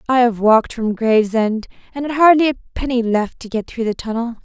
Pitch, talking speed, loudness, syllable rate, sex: 235 Hz, 215 wpm, -17 LUFS, 5.6 syllables/s, female